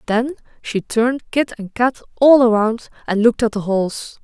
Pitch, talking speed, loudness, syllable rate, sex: 230 Hz, 185 wpm, -17 LUFS, 4.9 syllables/s, female